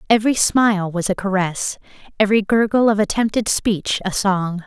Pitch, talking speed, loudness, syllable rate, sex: 205 Hz, 155 wpm, -18 LUFS, 5.4 syllables/s, female